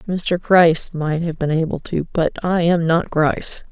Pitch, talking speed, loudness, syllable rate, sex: 165 Hz, 195 wpm, -18 LUFS, 4.3 syllables/s, female